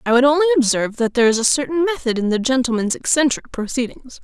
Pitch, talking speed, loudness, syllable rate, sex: 260 Hz, 215 wpm, -18 LUFS, 6.7 syllables/s, female